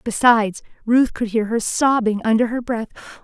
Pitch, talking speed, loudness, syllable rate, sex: 230 Hz, 165 wpm, -19 LUFS, 5.1 syllables/s, female